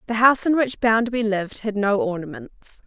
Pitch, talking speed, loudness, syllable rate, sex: 225 Hz, 190 wpm, -21 LUFS, 5.6 syllables/s, female